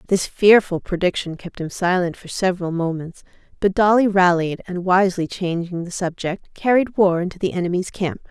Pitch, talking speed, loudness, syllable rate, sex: 180 Hz, 165 wpm, -20 LUFS, 5.3 syllables/s, female